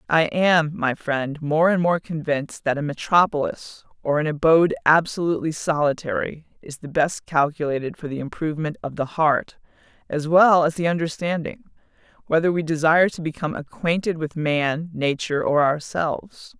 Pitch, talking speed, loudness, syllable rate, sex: 155 Hz, 150 wpm, -21 LUFS, 5.2 syllables/s, female